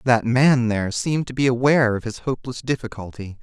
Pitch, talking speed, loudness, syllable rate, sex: 120 Hz, 195 wpm, -20 LUFS, 6.1 syllables/s, male